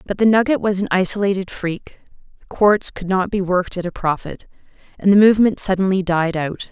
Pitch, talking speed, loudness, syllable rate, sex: 190 Hz, 195 wpm, -18 LUFS, 5.7 syllables/s, female